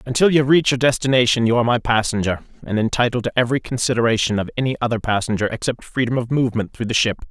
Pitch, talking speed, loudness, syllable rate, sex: 120 Hz, 205 wpm, -19 LUFS, 7.1 syllables/s, male